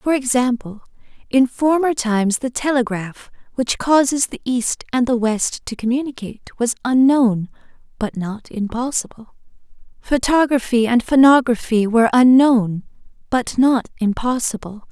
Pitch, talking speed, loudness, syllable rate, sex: 245 Hz, 115 wpm, -17 LUFS, 4.6 syllables/s, female